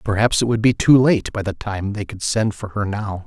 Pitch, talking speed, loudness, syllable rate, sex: 105 Hz, 275 wpm, -19 LUFS, 5.1 syllables/s, male